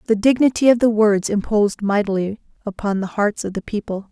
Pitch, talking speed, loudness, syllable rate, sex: 210 Hz, 190 wpm, -19 LUFS, 5.7 syllables/s, female